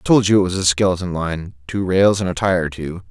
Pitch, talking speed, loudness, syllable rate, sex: 90 Hz, 290 wpm, -18 LUFS, 5.8 syllables/s, male